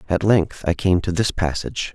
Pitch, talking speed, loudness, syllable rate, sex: 90 Hz, 215 wpm, -20 LUFS, 5.2 syllables/s, male